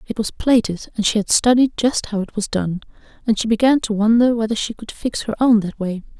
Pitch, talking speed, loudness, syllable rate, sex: 220 Hz, 240 wpm, -18 LUFS, 5.7 syllables/s, female